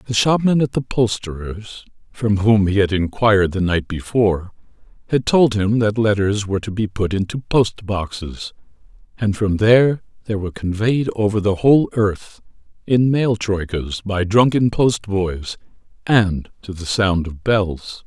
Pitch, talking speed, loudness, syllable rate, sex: 105 Hz, 160 wpm, -18 LUFS, 4.4 syllables/s, male